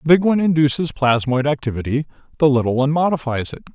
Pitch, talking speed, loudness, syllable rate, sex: 140 Hz, 175 wpm, -18 LUFS, 6.9 syllables/s, male